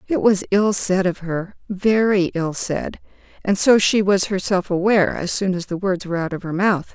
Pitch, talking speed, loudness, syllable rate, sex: 190 Hz, 205 wpm, -19 LUFS, 4.9 syllables/s, female